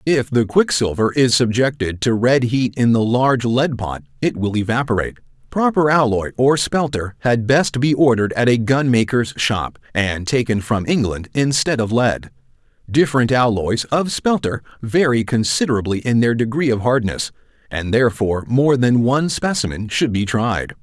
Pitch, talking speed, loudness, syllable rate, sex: 120 Hz, 160 wpm, -18 LUFS, 4.9 syllables/s, male